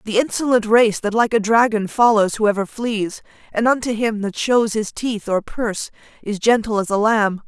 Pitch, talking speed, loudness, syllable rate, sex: 220 Hz, 195 wpm, -18 LUFS, 4.8 syllables/s, female